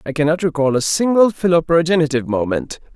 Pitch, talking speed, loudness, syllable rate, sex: 155 Hz, 140 wpm, -16 LUFS, 6.3 syllables/s, male